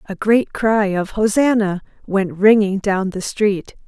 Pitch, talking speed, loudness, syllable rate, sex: 205 Hz, 155 wpm, -17 LUFS, 3.8 syllables/s, female